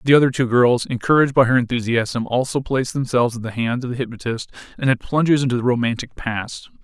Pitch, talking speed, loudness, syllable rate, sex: 125 Hz, 210 wpm, -19 LUFS, 6.3 syllables/s, male